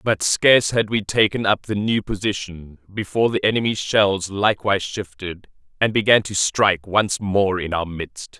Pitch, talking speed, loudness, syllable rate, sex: 100 Hz, 170 wpm, -19 LUFS, 4.8 syllables/s, male